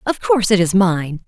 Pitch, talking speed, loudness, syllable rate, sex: 200 Hz, 235 wpm, -16 LUFS, 5.4 syllables/s, female